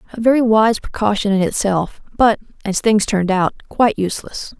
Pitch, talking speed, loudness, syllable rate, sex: 210 Hz, 170 wpm, -17 LUFS, 5.4 syllables/s, female